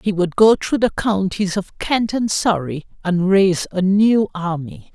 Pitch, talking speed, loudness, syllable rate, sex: 190 Hz, 180 wpm, -18 LUFS, 4.1 syllables/s, female